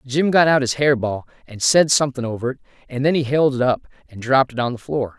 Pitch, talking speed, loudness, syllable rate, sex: 130 Hz, 265 wpm, -19 LUFS, 6.2 syllables/s, male